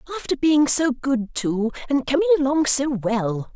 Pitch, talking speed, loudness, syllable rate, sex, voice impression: 255 Hz, 170 wpm, -20 LUFS, 4.6 syllables/s, female, feminine, very adult-like, slightly intellectual, slightly sweet